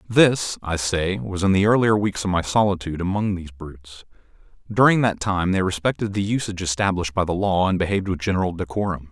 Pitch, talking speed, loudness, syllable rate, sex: 95 Hz, 200 wpm, -21 LUFS, 6.2 syllables/s, male